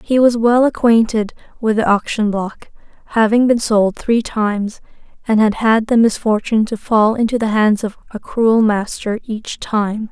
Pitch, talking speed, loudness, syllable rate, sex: 220 Hz, 165 wpm, -16 LUFS, 4.5 syllables/s, female